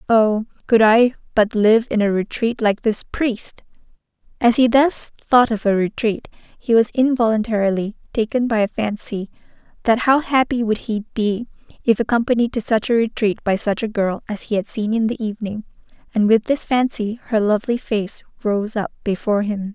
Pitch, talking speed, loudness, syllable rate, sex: 225 Hz, 180 wpm, -19 LUFS, 5.0 syllables/s, female